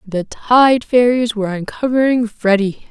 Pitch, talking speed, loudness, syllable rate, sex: 225 Hz, 125 wpm, -15 LUFS, 4.4 syllables/s, female